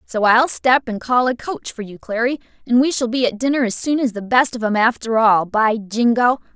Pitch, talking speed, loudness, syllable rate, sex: 235 Hz, 245 wpm, -17 LUFS, 5.2 syllables/s, female